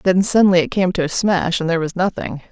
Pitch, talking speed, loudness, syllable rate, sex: 175 Hz, 240 wpm, -17 LUFS, 5.8 syllables/s, female